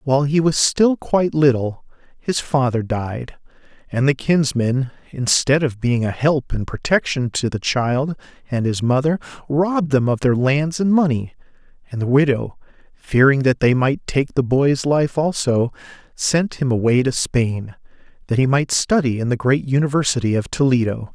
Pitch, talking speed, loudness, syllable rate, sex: 135 Hz, 165 wpm, -18 LUFS, 4.6 syllables/s, male